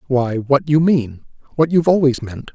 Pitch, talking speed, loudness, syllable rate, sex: 140 Hz, 165 wpm, -16 LUFS, 4.9 syllables/s, male